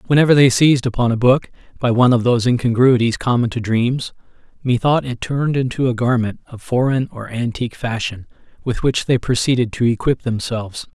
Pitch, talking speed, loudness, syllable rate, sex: 125 Hz, 175 wpm, -17 LUFS, 5.8 syllables/s, male